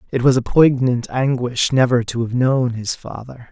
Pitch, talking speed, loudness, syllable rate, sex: 125 Hz, 190 wpm, -17 LUFS, 4.6 syllables/s, male